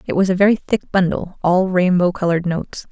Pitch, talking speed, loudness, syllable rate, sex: 185 Hz, 205 wpm, -17 LUFS, 5.8 syllables/s, female